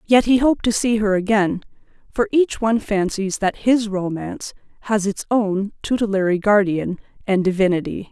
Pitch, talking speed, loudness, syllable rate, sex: 210 Hz, 155 wpm, -19 LUFS, 5.0 syllables/s, female